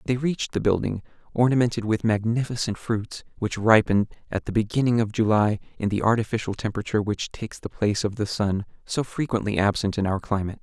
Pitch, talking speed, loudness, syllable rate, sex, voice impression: 110 Hz, 180 wpm, -24 LUFS, 6.2 syllables/s, male, masculine, slightly young, slightly adult-like, slightly thick, slightly relaxed, slightly weak, slightly bright, slightly soft, slightly clear, slightly fluent, slightly cool, intellectual, slightly refreshing, very sincere, calm, slightly mature, friendly, reassuring, slightly wild, slightly lively, kind, slightly modest